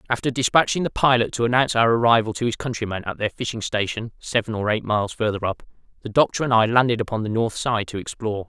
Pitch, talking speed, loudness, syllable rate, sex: 115 Hz, 225 wpm, -21 LUFS, 6.7 syllables/s, male